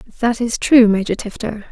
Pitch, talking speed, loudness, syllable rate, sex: 225 Hz, 175 wpm, -16 LUFS, 5.8 syllables/s, female